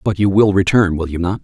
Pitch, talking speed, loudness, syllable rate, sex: 95 Hz, 295 wpm, -15 LUFS, 6.0 syllables/s, male